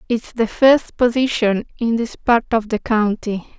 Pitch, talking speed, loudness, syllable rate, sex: 230 Hz, 165 wpm, -18 LUFS, 4.1 syllables/s, female